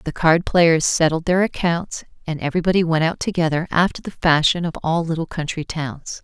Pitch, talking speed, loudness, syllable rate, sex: 165 Hz, 185 wpm, -19 LUFS, 5.4 syllables/s, female